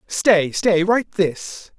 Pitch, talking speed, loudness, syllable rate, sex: 190 Hz, 135 wpm, -18 LUFS, 3.1 syllables/s, male